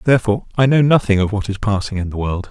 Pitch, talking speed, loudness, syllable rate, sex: 110 Hz, 265 wpm, -17 LUFS, 7.1 syllables/s, male